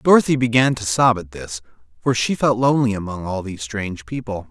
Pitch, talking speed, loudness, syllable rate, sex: 110 Hz, 200 wpm, -20 LUFS, 6.0 syllables/s, male